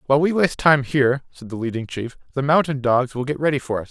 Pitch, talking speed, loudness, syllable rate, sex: 135 Hz, 260 wpm, -20 LUFS, 6.6 syllables/s, male